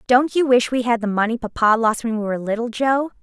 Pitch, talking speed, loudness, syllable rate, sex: 235 Hz, 260 wpm, -19 LUFS, 6.0 syllables/s, female